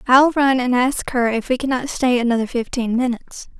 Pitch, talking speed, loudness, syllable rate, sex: 250 Hz, 200 wpm, -18 LUFS, 5.4 syllables/s, female